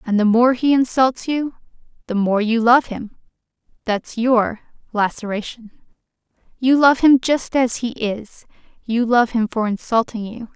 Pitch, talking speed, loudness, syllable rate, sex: 235 Hz, 150 wpm, -18 LUFS, 4.2 syllables/s, female